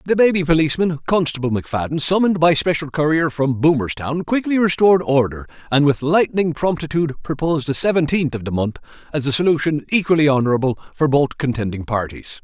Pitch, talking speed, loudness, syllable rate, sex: 150 Hz, 160 wpm, -18 LUFS, 6.1 syllables/s, male